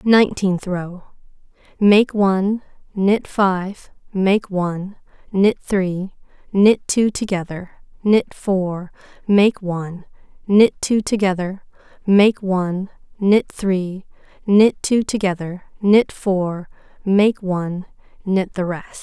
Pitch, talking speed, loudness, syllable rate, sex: 195 Hz, 105 wpm, -18 LUFS, 3.4 syllables/s, female